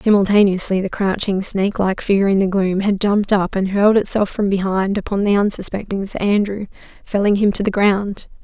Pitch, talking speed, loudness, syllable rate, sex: 200 Hz, 190 wpm, -17 LUFS, 5.7 syllables/s, female